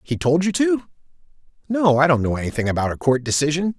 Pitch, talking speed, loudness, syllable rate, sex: 150 Hz, 175 wpm, -20 LUFS, 6.3 syllables/s, male